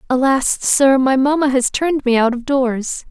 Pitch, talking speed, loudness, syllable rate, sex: 265 Hz, 195 wpm, -15 LUFS, 4.5 syllables/s, female